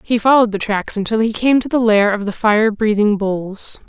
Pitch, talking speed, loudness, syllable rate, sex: 215 Hz, 230 wpm, -16 LUFS, 5.1 syllables/s, female